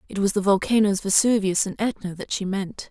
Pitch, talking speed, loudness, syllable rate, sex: 200 Hz, 205 wpm, -22 LUFS, 5.6 syllables/s, female